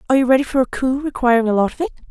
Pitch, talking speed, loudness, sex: 260 Hz, 315 wpm, -17 LUFS, female